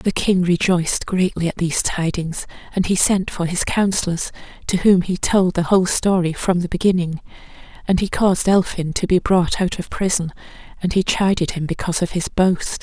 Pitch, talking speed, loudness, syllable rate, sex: 180 Hz, 190 wpm, -19 LUFS, 5.2 syllables/s, female